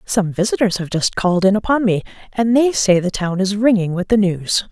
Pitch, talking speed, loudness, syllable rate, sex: 200 Hz, 230 wpm, -17 LUFS, 5.3 syllables/s, female